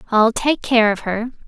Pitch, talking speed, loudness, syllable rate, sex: 230 Hz, 205 wpm, -17 LUFS, 4.6 syllables/s, female